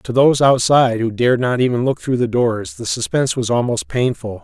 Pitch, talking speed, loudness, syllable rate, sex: 120 Hz, 215 wpm, -17 LUFS, 5.7 syllables/s, male